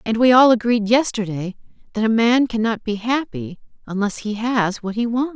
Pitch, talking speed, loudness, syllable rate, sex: 225 Hz, 190 wpm, -19 LUFS, 5.0 syllables/s, female